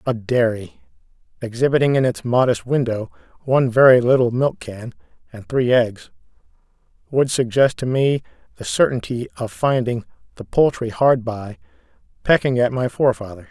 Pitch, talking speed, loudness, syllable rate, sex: 125 Hz, 140 wpm, -19 LUFS, 5.1 syllables/s, male